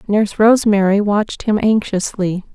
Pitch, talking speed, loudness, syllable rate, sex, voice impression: 205 Hz, 120 wpm, -15 LUFS, 5.2 syllables/s, female, feminine, adult-like, slightly powerful, clear, fluent, intellectual, calm, elegant, slightly kind